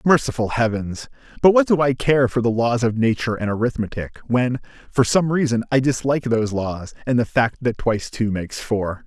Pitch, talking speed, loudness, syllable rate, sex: 120 Hz, 200 wpm, -20 LUFS, 5.5 syllables/s, male